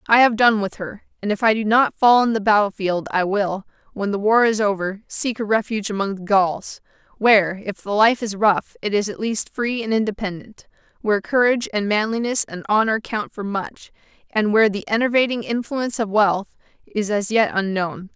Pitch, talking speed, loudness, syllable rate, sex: 215 Hz, 200 wpm, -20 LUFS, 5.2 syllables/s, female